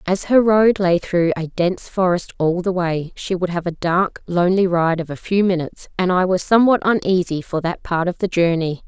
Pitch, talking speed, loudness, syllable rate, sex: 180 Hz, 225 wpm, -18 LUFS, 5.2 syllables/s, female